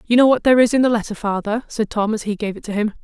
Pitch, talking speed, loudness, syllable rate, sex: 220 Hz, 335 wpm, -18 LUFS, 7.1 syllables/s, female